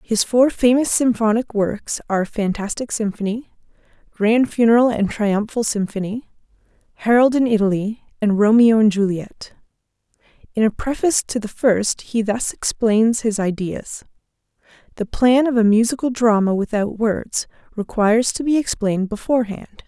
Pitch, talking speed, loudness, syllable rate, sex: 220 Hz, 135 wpm, -18 LUFS, 4.8 syllables/s, female